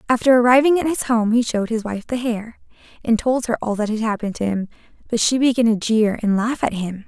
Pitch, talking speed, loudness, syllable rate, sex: 230 Hz, 245 wpm, -19 LUFS, 6.0 syllables/s, female